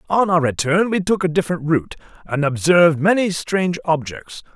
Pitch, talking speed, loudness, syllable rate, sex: 165 Hz, 170 wpm, -18 LUFS, 5.6 syllables/s, male